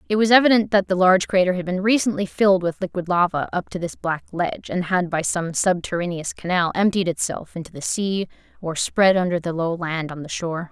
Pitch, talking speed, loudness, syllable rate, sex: 180 Hz, 220 wpm, -21 LUFS, 5.8 syllables/s, female